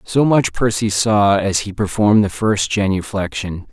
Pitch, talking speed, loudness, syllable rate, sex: 100 Hz, 160 wpm, -17 LUFS, 4.5 syllables/s, male